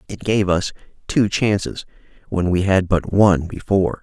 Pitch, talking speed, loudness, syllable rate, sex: 95 Hz, 165 wpm, -19 LUFS, 4.9 syllables/s, male